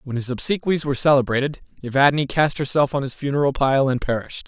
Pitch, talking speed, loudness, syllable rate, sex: 140 Hz, 190 wpm, -20 LUFS, 6.6 syllables/s, male